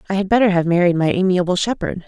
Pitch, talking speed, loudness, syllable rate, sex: 185 Hz, 230 wpm, -17 LUFS, 7.0 syllables/s, female